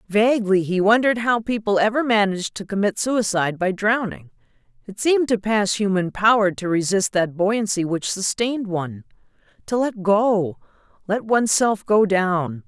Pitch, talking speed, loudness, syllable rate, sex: 205 Hz, 155 wpm, -20 LUFS, 5.0 syllables/s, female